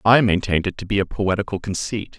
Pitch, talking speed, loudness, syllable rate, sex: 100 Hz, 220 wpm, -21 LUFS, 6.2 syllables/s, male